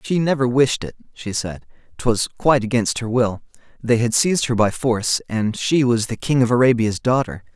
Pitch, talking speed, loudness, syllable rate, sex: 120 Hz, 200 wpm, -19 LUFS, 5.2 syllables/s, male